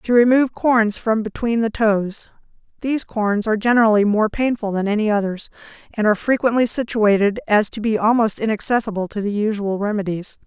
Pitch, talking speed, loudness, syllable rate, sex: 215 Hz, 160 wpm, -19 LUFS, 5.7 syllables/s, female